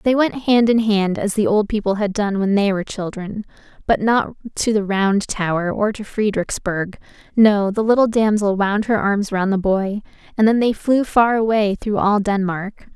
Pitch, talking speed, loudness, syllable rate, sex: 205 Hz, 200 wpm, -18 LUFS, 4.8 syllables/s, female